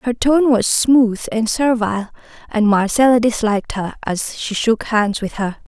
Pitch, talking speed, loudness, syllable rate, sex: 225 Hz, 165 wpm, -17 LUFS, 4.4 syllables/s, female